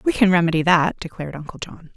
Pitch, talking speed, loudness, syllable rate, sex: 170 Hz, 215 wpm, -19 LUFS, 6.6 syllables/s, female